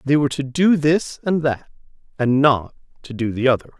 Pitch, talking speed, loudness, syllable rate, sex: 140 Hz, 205 wpm, -19 LUFS, 5.2 syllables/s, male